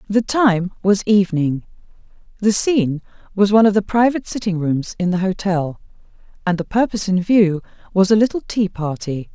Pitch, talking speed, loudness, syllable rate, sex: 195 Hz, 165 wpm, -18 LUFS, 5.4 syllables/s, female